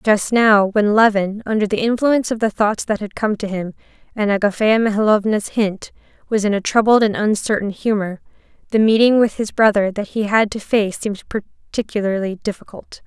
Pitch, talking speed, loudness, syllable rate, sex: 210 Hz, 180 wpm, -17 LUFS, 5.3 syllables/s, female